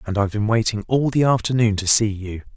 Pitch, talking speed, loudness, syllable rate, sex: 110 Hz, 235 wpm, -19 LUFS, 6.1 syllables/s, male